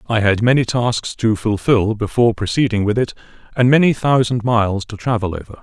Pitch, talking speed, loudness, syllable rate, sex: 115 Hz, 180 wpm, -17 LUFS, 5.6 syllables/s, male